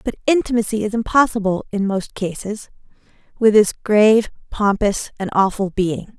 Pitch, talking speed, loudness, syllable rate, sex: 210 Hz, 135 wpm, -18 LUFS, 5.0 syllables/s, female